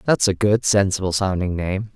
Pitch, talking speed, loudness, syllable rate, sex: 100 Hz, 185 wpm, -20 LUFS, 5.0 syllables/s, male